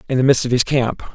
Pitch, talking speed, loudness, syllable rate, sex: 125 Hz, 315 wpm, -17 LUFS, 6.3 syllables/s, male